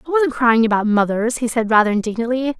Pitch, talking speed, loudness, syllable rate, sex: 240 Hz, 210 wpm, -17 LUFS, 6.2 syllables/s, female